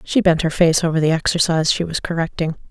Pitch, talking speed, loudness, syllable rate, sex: 165 Hz, 220 wpm, -18 LUFS, 6.4 syllables/s, female